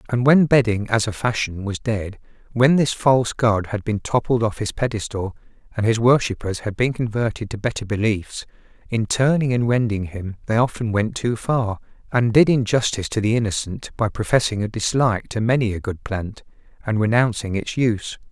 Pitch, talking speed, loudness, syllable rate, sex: 115 Hz, 185 wpm, -21 LUFS, 5.3 syllables/s, male